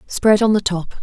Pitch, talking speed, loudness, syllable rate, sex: 200 Hz, 235 wpm, -16 LUFS, 4.5 syllables/s, female